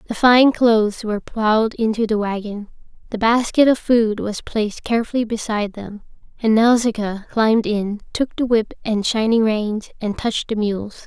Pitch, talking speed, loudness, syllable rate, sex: 220 Hz, 170 wpm, -19 LUFS, 4.9 syllables/s, female